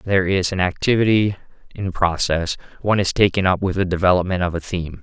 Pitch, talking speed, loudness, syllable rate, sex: 95 Hz, 190 wpm, -19 LUFS, 6.2 syllables/s, male